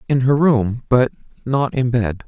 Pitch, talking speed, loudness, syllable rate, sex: 125 Hz, 185 wpm, -18 LUFS, 4.2 syllables/s, male